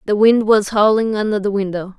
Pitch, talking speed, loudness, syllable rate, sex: 210 Hz, 210 wpm, -16 LUFS, 5.5 syllables/s, female